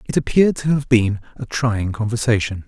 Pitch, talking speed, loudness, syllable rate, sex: 115 Hz, 180 wpm, -19 LUFS, 5.4 syllables/s, male